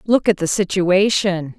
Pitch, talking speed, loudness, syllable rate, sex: 190 Hz, 150 wpm, -17 LUFS, 4.1 syllables/s, female